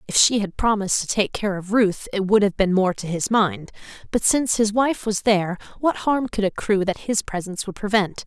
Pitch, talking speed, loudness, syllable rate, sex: 205 Hz, 230 wpm, -21 LUFS, 5.4 syllables/s, female